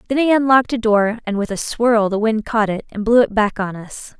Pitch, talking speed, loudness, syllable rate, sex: 220 Hz, 270 wpm, -17 LUFS, 5.5 syllables/s, female